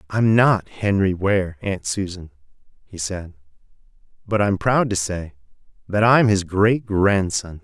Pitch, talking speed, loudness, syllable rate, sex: 95 Hz, 140 wpm, -20 LUFS, 3.9 syllables/s, male